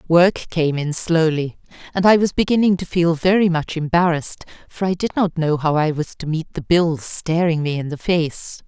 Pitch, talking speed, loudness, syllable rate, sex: 165 Hz, 205 wpm, -19 LUFS, 4.9 syllables/s, female